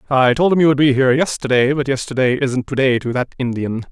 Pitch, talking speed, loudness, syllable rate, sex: 130 Hz, 245 wpm, -16 LUFS, 6.1 syllables/s, male